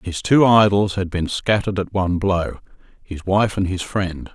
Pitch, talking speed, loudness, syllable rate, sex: 95 Hz, 180 wpm, -19 LUFS, 4.7 syllables/s, male